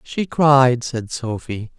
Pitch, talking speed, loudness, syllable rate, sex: 130 Hz, 135 wpm, -18 LUFS, 3.0 syllables/s, male